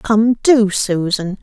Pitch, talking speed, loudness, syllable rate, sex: 210 Hz, 125 wpm, -15 LUFS, 2.9 syllables/s, female